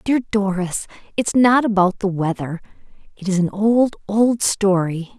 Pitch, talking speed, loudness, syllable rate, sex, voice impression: 200 Hz, 160 wpm, -19 LUFS, 4.4 syllables/s, female, feminine, adult-like, sincere, slightly calm, slightly unique